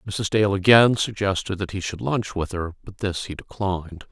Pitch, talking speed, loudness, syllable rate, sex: 100 Hz, 205 wpm, -22 LUFS, 5.0 syllables/s, male